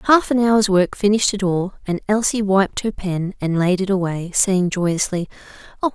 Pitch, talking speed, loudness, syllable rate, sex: 195 Hz, 190 wpm, -19 LUFS, 4.9 syllables/s, female